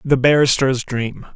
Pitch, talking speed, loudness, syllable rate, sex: 130 Hz, 135 wpm, -17 LUFS, 4.2 syllables/s, male